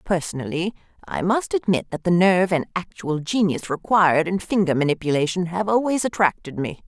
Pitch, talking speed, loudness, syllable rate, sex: 180 Hz, 155 wpm, -21 LUFS, 5.5 syllables/s, female